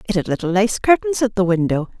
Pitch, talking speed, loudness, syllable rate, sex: 205 Hz, 240 wpm, -18 LUFS, 6.3 syllables/s, female